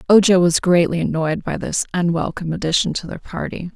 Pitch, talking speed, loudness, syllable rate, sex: 175 Hz, 175 wpm, -19 LUFS, 5.8 syllables/s, female